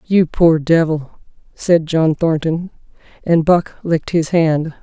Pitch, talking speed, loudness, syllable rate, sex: 165 Hz, 135 wpm, -16 LUFS, 3.8 syllables/s, female